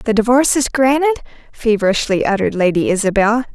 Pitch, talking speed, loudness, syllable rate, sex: 230 Hz, 135 wpm, -15 LUFS, 6.1 syllables/s, female